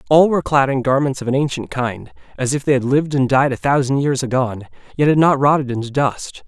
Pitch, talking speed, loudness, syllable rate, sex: 135 Hz, 240 wpm, -17 LUFS, 6.2 syllables/s, male